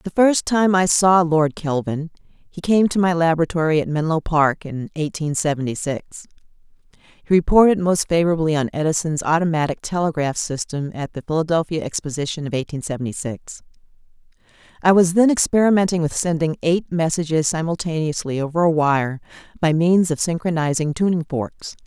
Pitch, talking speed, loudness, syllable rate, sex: 160 Hz, 150 wpm, -19 LUFS, 4.8 syllables/s, female